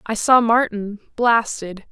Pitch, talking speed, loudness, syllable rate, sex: 220 Hz, 95 wpm, -17 LUFS, 3.7 syllables/s, female